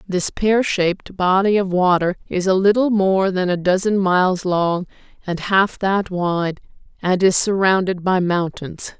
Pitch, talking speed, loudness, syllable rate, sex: 185 Hz, 160 wpm, -18 LUFS, 4.2 syllables/s, female